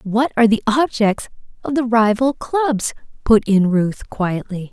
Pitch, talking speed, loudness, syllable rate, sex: 225 Hz, 155 wpm, -17 LUFS, 4.1 syllables/s, female